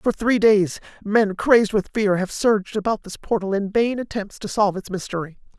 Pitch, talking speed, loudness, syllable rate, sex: 205 Hz, 205 wpm, -21 LUFS, 5.3 syllables/s, female